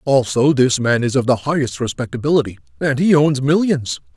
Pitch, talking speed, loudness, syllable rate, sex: 130 Hz, 175 wpm, -17 LUFS, 5.4 syllables/s, male